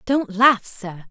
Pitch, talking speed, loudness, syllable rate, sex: 220 Hz, 160 wpm, -18 LUFS, 3.2 syllables/s, female